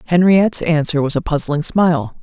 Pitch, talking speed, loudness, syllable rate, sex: 160 Hz, 160 wpm, -15 LUFS, 5.5 syllables/s, female